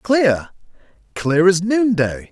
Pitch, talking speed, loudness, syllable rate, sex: 180 Hz, 80 wpm, -17 LUFS, 3.1 syllables/s, male